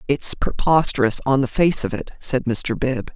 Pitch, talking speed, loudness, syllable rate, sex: 135 Hz, 190 wpm, -19 LUFS, 4.6 syllables/s, female